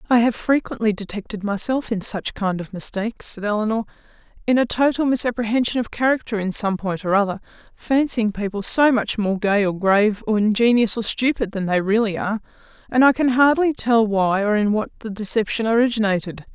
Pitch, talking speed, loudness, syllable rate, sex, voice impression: 220 Hz, 185 wpm, -20 LUFS, 5.6 syllables/s, female, feminine, slightly adult-like, slightly halting, slightly calm, slightly sweet